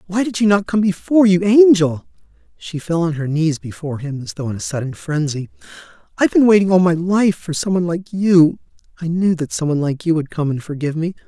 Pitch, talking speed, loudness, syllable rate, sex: 170 Hz, 235 wpm, -17 LUFS, 6.1 syllables/s, male